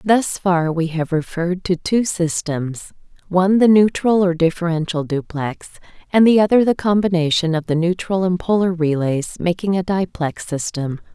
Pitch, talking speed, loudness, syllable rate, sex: 175 Hz, 155 wpm, -18 LUFS, 4.7 syllables/s, female